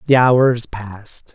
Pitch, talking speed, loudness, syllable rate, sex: 120 Hz, 135 wpm, -14 LUFS, 3.4 syllables/s, male